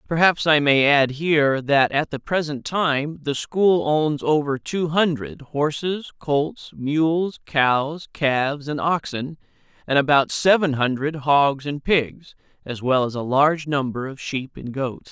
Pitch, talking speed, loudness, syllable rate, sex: 145 Hz, 160 wpm, -21 LUFS, 3.8 syllables/s, male